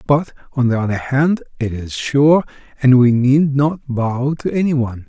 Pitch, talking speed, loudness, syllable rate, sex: 135 Hz, 190 wpm, -16 LUFS, 4.5 syllables/s, male